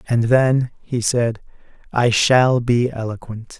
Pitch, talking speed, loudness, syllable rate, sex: 120 Hz, 135 wpm, -18 LUFS, 3.6 syllables/s, male